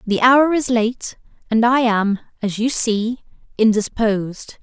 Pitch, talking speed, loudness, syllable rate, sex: 230 Hz, 115 wpm, -17 LUFS, 3.8 syllables/s, female